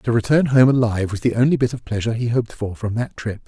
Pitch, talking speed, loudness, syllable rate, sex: 115 Hz, 275 wpm, -19 LUFS, 6.7 syllables/s, male